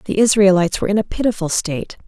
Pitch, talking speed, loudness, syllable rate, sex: 195 Hz, 205 wpm, -17 LUFS, 7.6 syllables/s, female